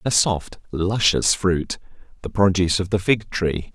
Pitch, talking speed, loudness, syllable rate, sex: 95 Hz, 160 wpm, -21 LUFS, 4.2 syllables/s, male